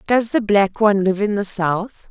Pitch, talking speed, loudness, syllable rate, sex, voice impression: 205 Hz, 230 wpm, -18 LUFS, 4.6 syllables/s, female, feminine, adult-like, tensed, slightly weak, slightly dark, soft, raspy, intellectual, calm, elegant, lively, slightly strict, sharp